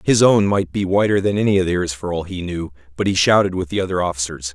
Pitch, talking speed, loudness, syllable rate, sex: 90 Hz, 265 wpm, -18 LUFS, 6.2 syllables/s, male